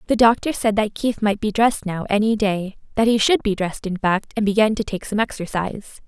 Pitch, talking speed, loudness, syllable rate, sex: 210 Hz, 225 wpm, -20 LUFS, 5.7 syllables/s, female